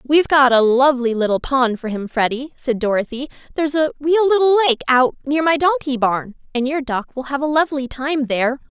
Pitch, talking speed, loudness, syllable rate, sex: 270 Hz, 215 wpm, -18 LUFS, 5.7 syllables/s, female